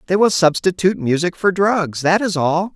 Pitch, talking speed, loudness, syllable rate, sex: 180 Hz, 195 wpm, -17 LUFS, 5.1 syllables/s, male